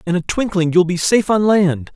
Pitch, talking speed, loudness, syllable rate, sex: 185 Hz, 275 wpm, -16 LUFS, 6.0 syllables/s, male